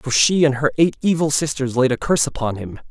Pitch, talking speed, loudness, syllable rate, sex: 140 Hz, 250 wpm, -18 LUFS, 6.0 syllables/s, male